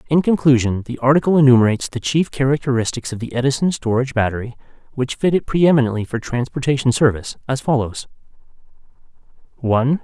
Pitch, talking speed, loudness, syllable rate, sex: 130 Hz, 140 wpm, -18 LUFS, 6.6 syllables/s, male